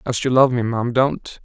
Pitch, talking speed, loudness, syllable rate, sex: 125 Hz, 250 wpm, -18 LUFS, 4.5 syllables/s, male